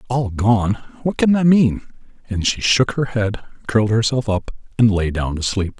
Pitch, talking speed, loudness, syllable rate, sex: 115 Hz, 195 wpm, -18 LUFS, 4.6 syllables/s, male